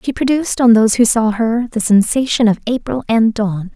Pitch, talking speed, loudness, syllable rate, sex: 230 Hz, 210 wpm, -14 LUFS, 5.5 syllables/s, female